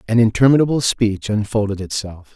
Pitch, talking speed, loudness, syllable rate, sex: 110 Hz, 125 wpm, -17 LUFS, 5.5 syllables/s, male